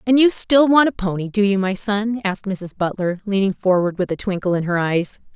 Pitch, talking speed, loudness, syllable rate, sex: 200 Hz, 235 wpm, -19 LUFS, 5.4 syllables/s, female